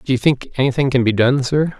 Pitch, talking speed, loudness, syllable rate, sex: 130 Hz, 300 wpm, -17 LUFS, 6.2 syllables/s, male